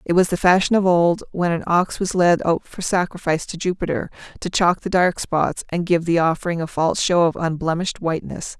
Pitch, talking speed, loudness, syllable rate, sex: 175 Hz, 215 wpm, -20 LUFS, 5.6 syllables/s, female